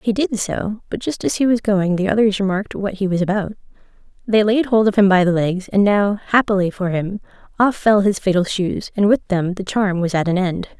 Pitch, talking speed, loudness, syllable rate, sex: 200 Hz, 235 wpm, -18 LUFS, 5.3 syllables/s, female